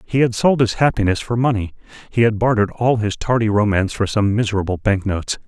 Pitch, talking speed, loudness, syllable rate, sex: 110 Hz, 195 wpm, -18 LUFS, 6.3 syllables/s, male